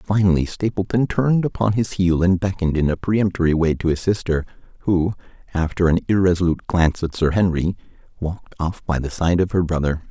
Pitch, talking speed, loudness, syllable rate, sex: 90 Hz, 185 wpm, -20 LUFS, 6.1 syllables/s, male